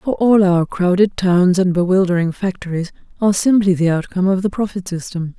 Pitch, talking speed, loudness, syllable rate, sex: 185 Hz, 180 wpm, -16 LUFS, 5.5 syllables/s, female